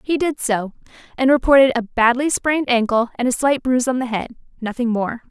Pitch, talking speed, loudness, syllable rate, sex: 250 Hz, 205 wpm, -18 LUFS, 5.7 syllables/s, female